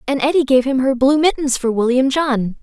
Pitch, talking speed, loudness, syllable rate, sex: 265 Hz, 230 wpm, -16 LUFS, 5.3 syllables/s, female